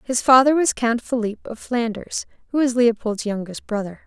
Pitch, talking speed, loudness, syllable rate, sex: 230 Hz, 175 wpm, -20 LUFS, 5.2 syllables/s, female